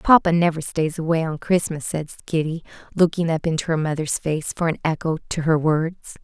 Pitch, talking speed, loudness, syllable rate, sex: 160 Hz, 190 wpm, -22 LUFS, 5.6 syllables/s, female